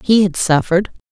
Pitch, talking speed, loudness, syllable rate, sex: 185 Hz, 160 wpm, -15 LUFS, 6.0 syllables/s, female